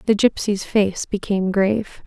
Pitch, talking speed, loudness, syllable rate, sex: 200 Hz, 145 wpm, -20 LUFS, 4.9 syllables/s, female